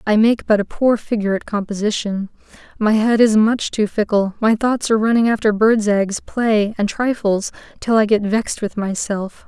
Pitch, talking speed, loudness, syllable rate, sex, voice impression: 215 Hz, 190 wpm, -17 LUFS, 4.9 syllables/s, female, feminine, slightly young, slightly refreshing, sincere, friendly, slightly kind